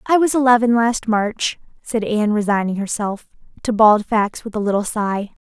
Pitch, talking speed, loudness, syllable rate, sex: 220 Hz, 175 wpm, -18 LUFS, 5.0 syllables/s, female